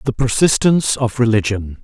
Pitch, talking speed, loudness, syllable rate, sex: 120 Hz, 130 wpm, -16 LUFS, 5.4 syllables/s, male